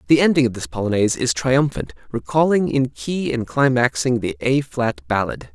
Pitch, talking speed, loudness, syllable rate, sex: 125 Hz, 175 wpm, -19 LUFS, 5.3 syllables/s, male